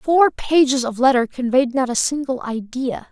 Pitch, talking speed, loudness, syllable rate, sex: 260 Hz, 175 wpm, -18 LUFS, 4.6 syllables/s, female